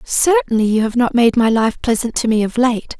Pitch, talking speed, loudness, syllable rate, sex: 230 Hz, 240 wpm, -15 LUFS, 5.2 syllables/s, female